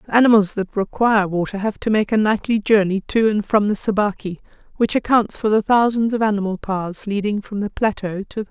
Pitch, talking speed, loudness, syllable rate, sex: 210 Hz, 220 wpm, -19 LUFS, 5.9 syllables/s, female